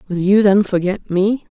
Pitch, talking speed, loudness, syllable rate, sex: 195 Hz, 195 wpm, -16 LUFS, 4.6 syllables/s, female